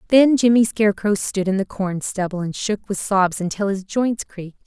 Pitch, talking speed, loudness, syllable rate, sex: 200 Hz, 205 wpm, -20 LUFS, 5.0 syllables/s, female